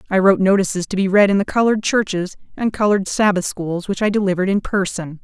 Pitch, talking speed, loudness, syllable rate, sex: 195 Hz, 220 wpm, -18 LUFS, 6.6 syllables/s, female